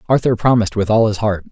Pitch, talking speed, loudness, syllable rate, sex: 110 Hz, 235 wpm, -16 LUFS, 7.0 syllables/s, male